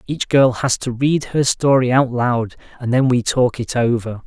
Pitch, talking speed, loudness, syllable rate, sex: 125 Hz, 210 wpm, -17 LUFS, 4.4 syllables/s, male